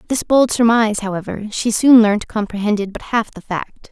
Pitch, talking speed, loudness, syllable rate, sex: 215 Hz, 185 wpm, -16 LUFS, 5.3 syllables/s, female